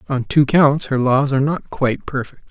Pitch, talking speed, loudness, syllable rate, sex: 135 Hz, 215 wpm, -17 LUFS, 5.3 syllables/s, male